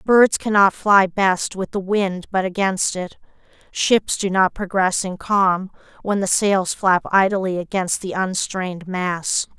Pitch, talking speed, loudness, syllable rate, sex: 190 Hz, 155 wpm, -19 LUFS, 3.8 syllables/s, female